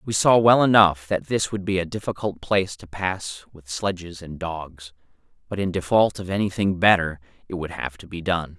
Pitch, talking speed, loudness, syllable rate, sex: 90 Hz, 205 wpm, -22 LUFS, 5.0 syllables/s, male